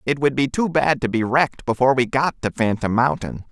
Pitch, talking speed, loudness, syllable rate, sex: 130 Hz, 240 wpm, -20 LUFS, 5.7 syllables/s, male